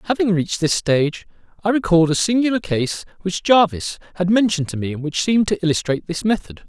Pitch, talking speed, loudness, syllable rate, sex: 180 Hz, 200 wpm, -19 LUFS, 6.5 syllables/s, male